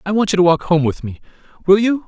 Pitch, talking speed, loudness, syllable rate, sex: 185 Hz, 260 wpm, -15 LUFS, 6.7 syllables/s, male